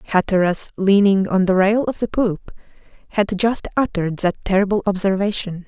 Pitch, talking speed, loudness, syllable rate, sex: 195 Hz, 150 wpm, -19 LUFS, 5.3 syllables/s, female